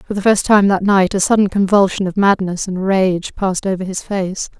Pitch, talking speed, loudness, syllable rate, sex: 190 Hz, 220 wpm, -15 LUFS, 5.3 syllables/s, female